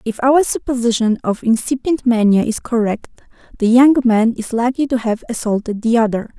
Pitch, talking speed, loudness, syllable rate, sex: 235 Hz, 170 wpm, -16 LUFS, 5.4 syllables/s, female